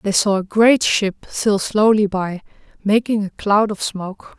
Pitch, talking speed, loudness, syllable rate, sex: 205 Hz, 180 wpm, -17 LUFS, 4.2 syllables/s, female